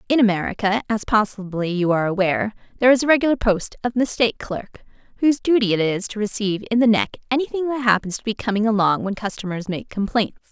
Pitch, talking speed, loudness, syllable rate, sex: 215 Hz, 200 wpm, -20 LUFS, 6.5 syllables/s, female